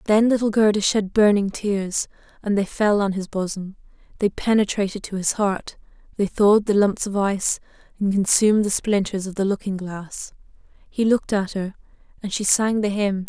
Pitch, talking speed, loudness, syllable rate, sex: 200 Hz, 180 wpm, -21 LUFS, 5.1 syllables/s, female